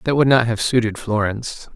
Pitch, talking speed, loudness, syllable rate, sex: 115 Hz, 205 wpm, -18 LUFS, 5.6 syllables/s, male